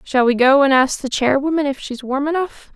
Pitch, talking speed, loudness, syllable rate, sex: 275 Hz, 260 wpm, -17 LUFS, 5.3 syllables/s, female